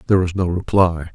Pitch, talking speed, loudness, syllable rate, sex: 90 Hz, 210 wpm, -18 LUFS, 6.7 syllables/s, male